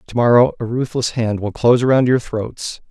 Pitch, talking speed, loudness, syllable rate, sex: 120 Hz, 205 wpm, -17 LUFS, 5.3 syllables/s, male